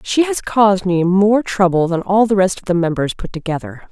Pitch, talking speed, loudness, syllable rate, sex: 190 Hz, 230 wpm, -16 LUFS, 5.3 syllables/s, female